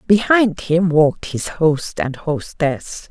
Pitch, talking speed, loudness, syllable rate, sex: 165 Hz, 135 wpm, -18 LUFS, 3.4 syllables/s, female